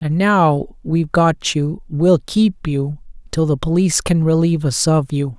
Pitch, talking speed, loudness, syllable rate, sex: 160 Hz, 180 wpm, -17 LUFS, 4.3 syllables/s, male